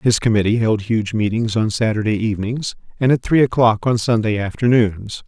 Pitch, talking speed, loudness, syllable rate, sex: 110 Hz, 170 wpm, -18 LUFS, 5.2 syllables/s, male